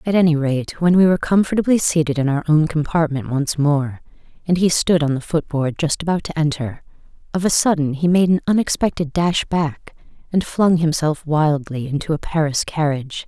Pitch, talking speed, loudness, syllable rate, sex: 160 Hz, 185 wpm, -18 LUFS, 5.3 syllables/s, female